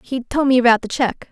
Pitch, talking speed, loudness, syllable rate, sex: 245 Hz, 275 wpm, -17 LUFS, 6.7 syllables/s, female